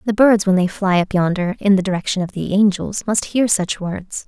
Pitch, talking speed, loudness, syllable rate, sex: 195 Hz, 240 wpm, -18 LUFS, 5.2 syllables/s, female